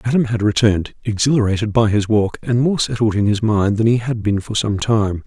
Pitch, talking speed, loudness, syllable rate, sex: 110 Hz, 230 wpm, -17 LUFS, 5.5 syllables/s, male